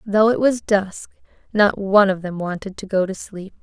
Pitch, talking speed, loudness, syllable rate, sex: 200 Hz, 215 wpm, -19 LUFS, 4.9 syllables/s, female